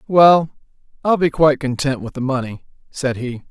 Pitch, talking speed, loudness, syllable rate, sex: 140 Hz, 170 wpm, -17 LUFS, 5.1 syllables/s, male